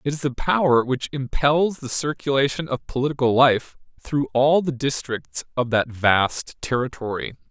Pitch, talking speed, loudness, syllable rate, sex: 135 Hz, 150 wpm, -22 LUFS, 4.5 syllables/s, male